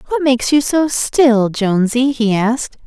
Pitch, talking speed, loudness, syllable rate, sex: 250 Hz, 165 wpm, -15 LUFS, 4.6 syllables/s, female